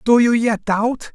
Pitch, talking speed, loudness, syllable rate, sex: 230 Hz, 210 wpm, -17 LUFS, 3.9 syllables/s, male